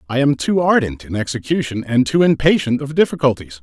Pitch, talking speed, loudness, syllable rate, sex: 130 Hz, 180 wpm, -17 LUFS, 5.8 syllables/s, male